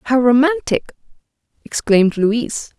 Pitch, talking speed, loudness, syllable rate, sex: 250 Hz, 85 wpm, -16 LUFS, 4.8 syllables/s, female